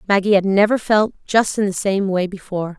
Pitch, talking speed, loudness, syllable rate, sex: 195 Hz, 215 wpm, -18 LUFS, 5.6 syllables/s, female